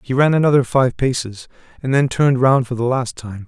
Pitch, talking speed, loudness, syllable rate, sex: 125 Hz, 225 wpm, -17 LUFS, 5.6 syllables/s, male